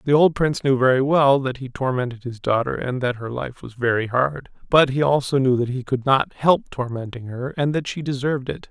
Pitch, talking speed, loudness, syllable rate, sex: 130 Hz, 235 wpm, -21 LUFS, 5.4 syllables/s, male